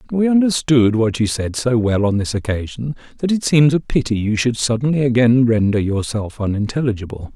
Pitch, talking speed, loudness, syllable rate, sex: 120 Hz, 180 wpm, -17 LUFS, 5.4 syllables/s, male